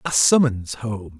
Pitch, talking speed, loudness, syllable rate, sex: 110 Hz, 150 wpm, -20 LUFS, 3.7 syllables/s, male